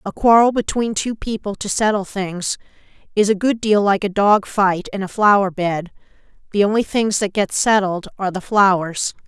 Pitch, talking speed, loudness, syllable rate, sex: 200 Hz, 190 wpm, -18 LUFS, 4.9 syllables/s, female